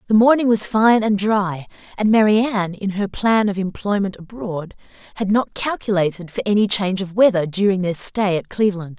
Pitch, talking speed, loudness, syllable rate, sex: 200 Hz, 180 wpm, -18 LUFS, 5.2 syllables/s, female